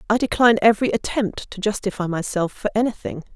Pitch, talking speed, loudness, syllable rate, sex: 205 Hz, 160 wpm, -21 LUFS, 6.3 syllables/s, female